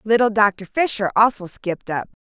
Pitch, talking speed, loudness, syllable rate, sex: 210 Hz, 160 wpm, -20 LUFS, 5.1 syllables/s, female